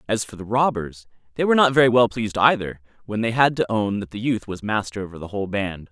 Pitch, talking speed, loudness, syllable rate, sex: 110 Hz, 255 wpm, -21 LUFS, 6.4 syllables/s, male